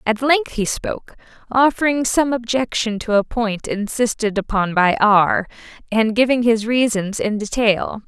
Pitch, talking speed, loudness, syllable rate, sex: 225 Hz, 150 wpm, -18 LUFS, 4.4 syllables/s, female